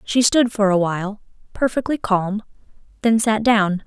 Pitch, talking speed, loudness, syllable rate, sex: 215 Hz, 155 wpm, -19 LUFS, 4.6 syllables/s, female